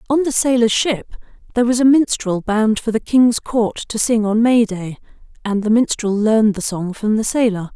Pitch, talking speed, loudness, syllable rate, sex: 225 Hz, 210 wpm, -17 LUFS, 5.0 syllables/s, female